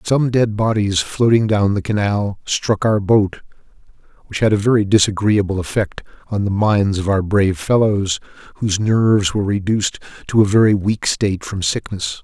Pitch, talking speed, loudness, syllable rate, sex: 105 Hz, 165 wpm, -17 LUFS, 5.1 syllables/s, male